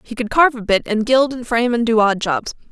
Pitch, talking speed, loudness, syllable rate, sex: 235 Hz, 285 wpm, -17 LUFS, 6.1 syllables/s, female